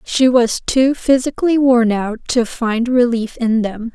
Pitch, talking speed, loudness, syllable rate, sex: 240 Hz, 165 wpm, -15 LUFS, 4.0 syllables/s, female